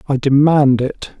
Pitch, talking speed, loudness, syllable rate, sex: 140 Hz, 150 wpm, -14 LUFS, 4.0 syllables/s, male